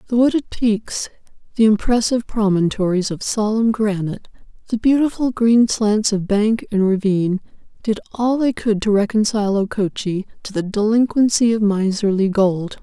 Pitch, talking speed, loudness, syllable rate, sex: 210 Hz, 140 wpm, -18 LUFS, 4.9 syllables/s, female